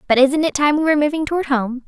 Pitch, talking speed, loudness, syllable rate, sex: 285 Hz, 290 wpm, -17 LUFS, 7.1 syllables/s, female